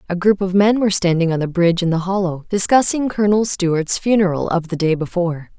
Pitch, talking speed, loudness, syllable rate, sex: 185 Hz, 215 wpm, -17 LUFS, 6.0 syllables/s, female